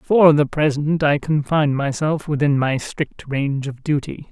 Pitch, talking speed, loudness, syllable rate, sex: 145 Hz, 165 wpm, -19 LUFS, 4.5 syllables/s, female